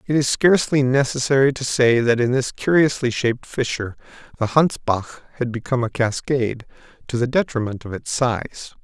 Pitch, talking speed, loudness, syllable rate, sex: 125 Hz, 165 wpm, -20 LUFS, 5.4 syllables/s, male